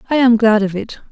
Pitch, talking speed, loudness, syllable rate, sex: 225 Hz, 270 wpm, -14 LUFS, 6.0 syllables/s, female